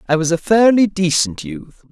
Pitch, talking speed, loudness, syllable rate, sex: 185 Hz, 190 wpm, -15 LUFS, 4.9 syllables/s, male